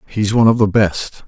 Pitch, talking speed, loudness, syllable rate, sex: 105 Hz, 235 wpm, -14 LUFS, 5.5 syllables/s, male